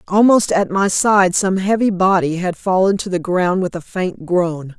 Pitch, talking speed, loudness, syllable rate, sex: 185 Hz, 200 wpm, -16 LUFS, 4.3 syllables/s, female